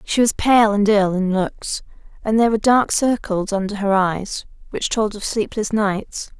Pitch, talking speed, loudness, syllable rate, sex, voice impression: 210 Hz, 190 wpm, -19 LUFS, 4.5 syllables/s, female, feminine, slightly young, slightly adult-like, thin, slightly relaxed, slightly weak, slightly dark, slightly hard, slightly muffled, fluent, slightly raspy, cute, slightly intellectual, slightly refreshing, sincere, slightly calm, slightly friendly, slightly reassuring, slightly elegant, slightly sweet, slightly kind, slightly modest